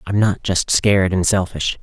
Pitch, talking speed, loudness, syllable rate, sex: 95 Hz, 195 wpm, -17 LUFS, 4.8 syllables/s, male